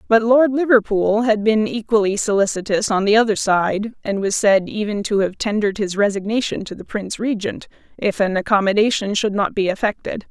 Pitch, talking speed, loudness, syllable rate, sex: 210 Hz, 180 wpm, -18 LUFS, 5.5 syllables/s, female